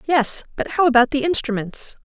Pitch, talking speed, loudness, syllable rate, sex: 265 Hz, 175 wpm, -19 LUFS, 5.0 syllables/s, female